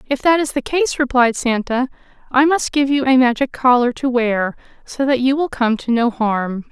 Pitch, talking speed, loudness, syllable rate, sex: 255 Hz, 215 wpm, -17 LUFS, 4.8 syllables/s, female